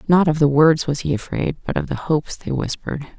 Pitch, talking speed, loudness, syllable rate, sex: 150 Hz, 245 wpm, -20 LUFS, 5.8 syllables/s, female